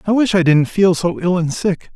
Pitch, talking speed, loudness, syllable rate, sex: 180 Hz, 275 wpm, -16 LUFS, 5.0 syllables/s, male